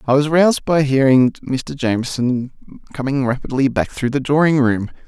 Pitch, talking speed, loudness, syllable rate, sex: 135 Hz, 165 wpm, -17 LUFS, 5.0 syllables/s, male